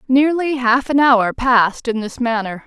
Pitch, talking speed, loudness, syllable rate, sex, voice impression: 245 Hz, 180 wpm, -16 LUFS, 4.4 syllables/s, female, very feminine, slightly young, thin, very tensed, powerful, bright, very hard, very clear, fluent, slightly raspy, very cool, intellectual, very refreshing, very sincere, calm, friendly, reassuring, very unique, slightly elegant, wild, sweet, lively, strict, slightly intense